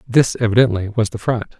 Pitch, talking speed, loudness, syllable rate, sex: 110 Hz, 190 wpm, -17 LUFS, 6.1 syllables/s, male